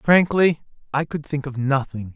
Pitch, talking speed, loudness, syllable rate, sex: 145 Hz, 165 wpm, -21 LUFS, 4.4 syllables/s, male